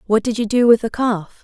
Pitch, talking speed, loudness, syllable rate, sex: 225 Hz, 295 wpm, -17 LUFS, 5.5 syllables/s, female